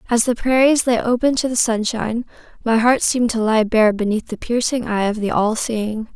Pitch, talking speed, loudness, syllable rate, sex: 230 Hz, 215 wpm, -18 LUFS, 5.3 syllables/s, female